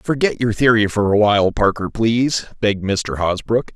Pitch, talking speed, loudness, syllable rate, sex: 110 Hz, 175 wpm, -17 LUFS, 5.0 syllables/s, male